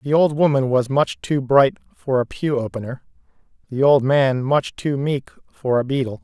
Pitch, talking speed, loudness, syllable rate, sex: 135 Hz, 190 wpm, -19 LUFS, 4.6 syllables/s, male